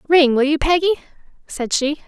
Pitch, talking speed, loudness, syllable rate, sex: 300 Hz, 175 wpm, -18 LUFS, 5.7 syllables/s, female